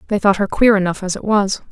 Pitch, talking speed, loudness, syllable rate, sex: 200 Hz, 280 wpm, -16 LUFS, 6.2 syllables/s, female